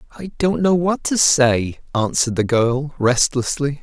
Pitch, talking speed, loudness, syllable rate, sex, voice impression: 140 Hz, 155 wpm, -18 LUFS, 4.3 syllables/s, male, masculine, middle-aged, slightly powerful, slightly bright, raspy, mature, friendly, wild, lively, intense